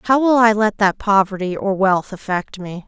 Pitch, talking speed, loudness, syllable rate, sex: 205 Hz, 210 wpm, -17 LUFS, 4.6 syllables/s, female